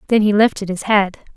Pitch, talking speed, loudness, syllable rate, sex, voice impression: 205 Hz, 220 wpm, -16 LUFS, 5.6 syllables/s, female, feminine, slightly young, slightly cute, slightly refreshing, friendly